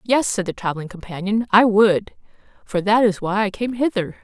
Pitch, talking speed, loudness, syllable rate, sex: 205 Hz, 200 wpm, -19 LUFS, 5.3 syllables/s, female